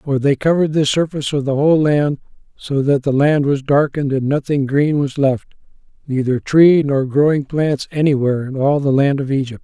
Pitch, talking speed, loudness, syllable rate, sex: 140 Hz, 200 wpm, -16 LUFS, 5.4 syllables/s, male